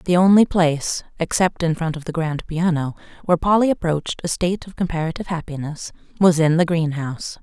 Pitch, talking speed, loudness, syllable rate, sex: 165 Hz, 180 wpm, -20 LUFS, 5.9 syllables/s, female